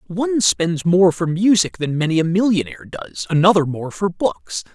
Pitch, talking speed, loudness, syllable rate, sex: 175 Hz, 175 wpm, -18 LUFS, 5.0 syllables/s, male